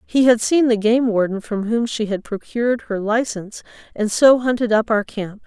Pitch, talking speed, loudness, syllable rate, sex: 225 Hz, 210 wpm, -18 LUFS, 5.0 syllables/s, female